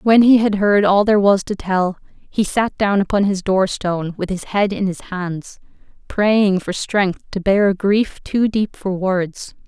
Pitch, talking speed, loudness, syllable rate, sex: 195 Hz, 205 wpm, -17 LUFS, 4.1 syllables/s, female